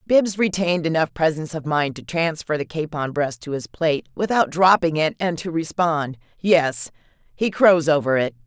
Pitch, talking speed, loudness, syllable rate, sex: 160 Hz, 170 wpm, -21 LUFS, 4.9 syllables/s, female